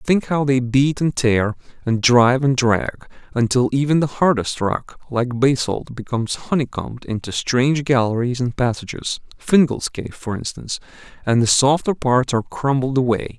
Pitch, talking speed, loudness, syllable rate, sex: 130 Hz, 150 wpm, -19 LUFS, 4.9 syllables/s, male